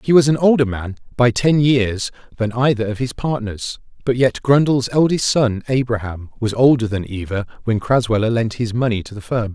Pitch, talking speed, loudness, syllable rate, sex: 120 Hz, 195 wpm, -18 LUFS, 5.2 syllables/s, male